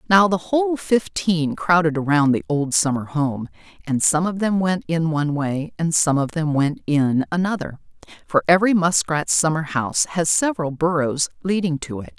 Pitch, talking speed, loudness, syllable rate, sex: 160 Hz, 175 wpm, -20 LUFS, 4.9 syllables/s, female